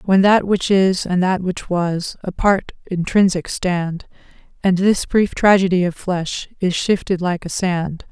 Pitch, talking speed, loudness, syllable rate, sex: 185 Hz, 165 wpm, -18 LUFS, 3.9 syllables/s, female